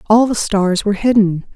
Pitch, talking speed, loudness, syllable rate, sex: 205 Hz, 195 wpm, -15 LUFS, 5.1 syllables/s, female